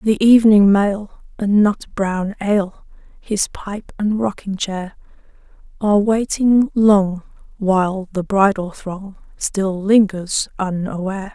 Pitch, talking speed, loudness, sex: 200 Hz, 115 wpm, -17 LUFS, female